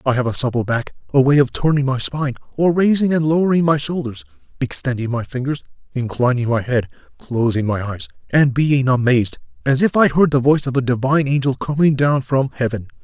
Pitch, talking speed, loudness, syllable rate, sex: 135 Hz, 200 wpm, -18 LUFS, 5.9 syllables/s, male